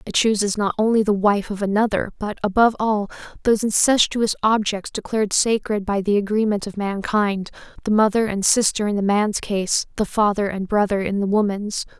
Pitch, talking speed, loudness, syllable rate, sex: 205 Hz, 175 wpm, -20 LUFS, 5.3 syllables/s, female